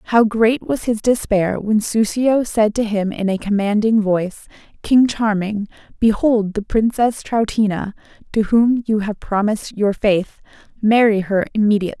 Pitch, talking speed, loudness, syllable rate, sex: 215 Hz, 150 wpm, -17 LUFS, 4.6 syllables/s, female